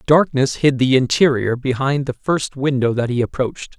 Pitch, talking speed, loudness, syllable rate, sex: 130 Hz, 175 wpm, -18 LUFS, 4.9 syllables/s, male